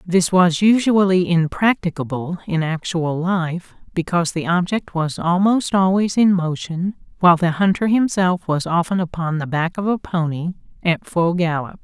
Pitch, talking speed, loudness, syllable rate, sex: 175 Hz, 150 wpm, -19 LUFS, 4.6 syllables/s, female